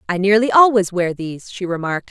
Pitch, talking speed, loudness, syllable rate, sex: 195 Hz, 200 wpm, -16 LUFS, 6.2 syllables/s, female